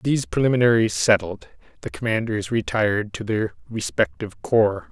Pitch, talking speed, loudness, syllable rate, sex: 110 Hz, 120 wpm, -21 LUFS, 5.2 syllables/s, male